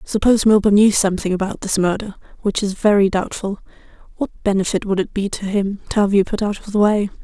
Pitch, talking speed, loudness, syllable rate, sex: 200 Hz, 200 wpm, -18 LUFS, 6.1 syllables/s, female